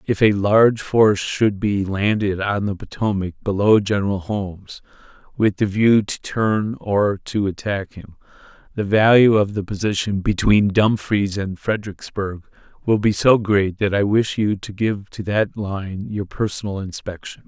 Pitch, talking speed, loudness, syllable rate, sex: 100 Hz, 160 wpm, -19 LUFS, 4.4 syllables/s, male